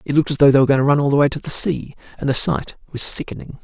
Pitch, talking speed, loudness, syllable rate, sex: 140 Hz, 330 wpm, -17 LUFS, 7.6 syllables/s, male